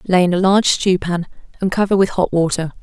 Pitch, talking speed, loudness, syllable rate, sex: 185 Hz, 235 wpm, -16 LUFS, 6.0 syllables/s, female